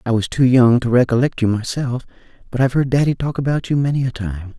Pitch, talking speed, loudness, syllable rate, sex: 125 Hz, 235 wpm, -17 LUFS, 6.2 syllables/s, male